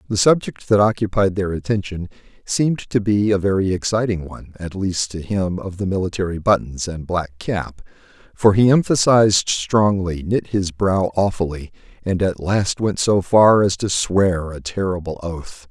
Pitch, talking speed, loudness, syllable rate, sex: 95 Hz, 170 wpm, -19 LUFS, 4.6 syllables/s, male